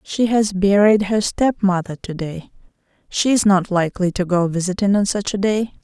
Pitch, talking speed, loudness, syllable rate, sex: 195 Hz, 185 wpm, -18 LUFS, 4.9 syllables/s, female